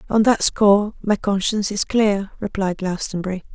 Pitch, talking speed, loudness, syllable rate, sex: 200 Hz, 150 wpm, -19 LUFS, 5.1 syllables/s, female